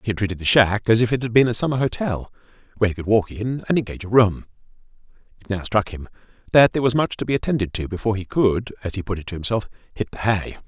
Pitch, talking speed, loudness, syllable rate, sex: 110 Hz, 260 wpm, -21 LUFS, 7.0 syllables/s, male